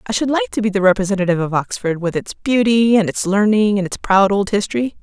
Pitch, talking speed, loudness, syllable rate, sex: 200 Hz, 240 wpm, -16 LUFS, 6.2 syllables/s, female